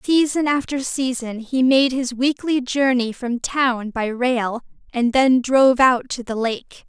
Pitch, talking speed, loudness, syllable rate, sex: 255 Hz, 165 wpm, -19 LUFS, 3.9 syllables/s, female